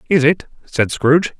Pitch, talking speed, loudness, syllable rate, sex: 150 Hz, 170 wpm, -16 LUFS, 4.9 syllables/s, male